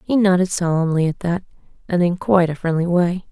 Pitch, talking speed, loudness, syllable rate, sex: 175 Hz, 200 wpm, -19 LUFS, 5.9 syllables/s, female